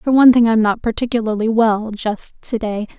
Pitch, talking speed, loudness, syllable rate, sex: 225 Hz, 180 wpm, -16 LUFS, 5.3 syllables/s, female